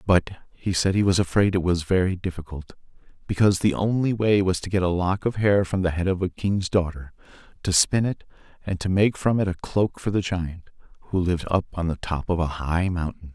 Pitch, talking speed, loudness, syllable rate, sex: 90 Hz, 230 wpm, -23 LUFS, 5.5 syllables/s, male